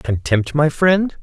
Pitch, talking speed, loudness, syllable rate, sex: 145 Hz, 145 wpm, -17 LUFS, 3.5 syllables/s, male